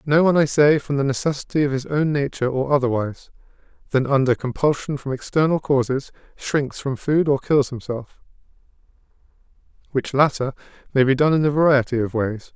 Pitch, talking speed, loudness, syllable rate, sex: 135 Hz, 165 wpm, -20 LUFS, 5.7 syllables/s, male